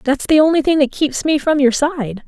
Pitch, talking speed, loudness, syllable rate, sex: 285 Hz, 265 wpm, -15 LUFS, 5.1 syllables/s, female